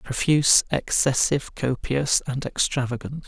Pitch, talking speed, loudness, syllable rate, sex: 135 Hz, 90 wpm, -22 LUFS, 4.6 syllables/s, male